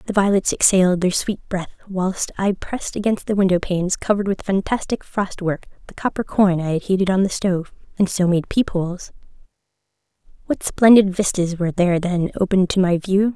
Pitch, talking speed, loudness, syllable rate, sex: 190 Hz, 180 wpm, -19 LUFS, 5.5 syllables/s, female